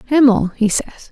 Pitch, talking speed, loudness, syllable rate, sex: 235 Hz, 160 wpm, -15 LUFS, 6.1 syllables/s, female